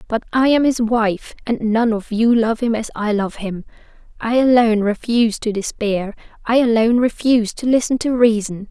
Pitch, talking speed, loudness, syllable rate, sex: 225 Hz, 185 wpm, -17 LUFS, 5.1 syllables/s, female